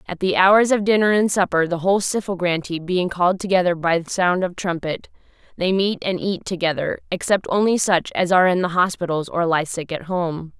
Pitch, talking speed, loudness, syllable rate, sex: 180 Hz, 200 wpm, -20 LUFS, 5.3 syllables/s, female